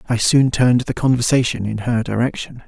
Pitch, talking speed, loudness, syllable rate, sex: 120 Hz, 180 wpm, -17 LUFS, 5.6 syllables/s, male